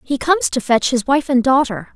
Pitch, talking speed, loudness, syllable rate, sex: 260 Hz, 245 wpm, -16 LUFS, 5.5 syllables/s, female